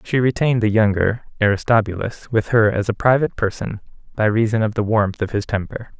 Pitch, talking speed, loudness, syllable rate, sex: 110 Hz, 200 wpm, -19 LUFS, 5.9 syllables/s, male